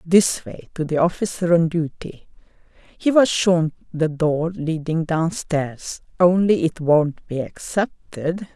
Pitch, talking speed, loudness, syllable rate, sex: 165 Hz, 135 wpm, -20 LUFS, 4.7 syllables/s, female